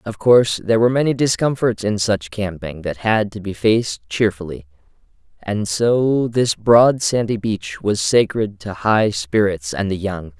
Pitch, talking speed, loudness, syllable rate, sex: 105 Hz, 165 wpm, -18 LUFS, 4.5 syllables/s, male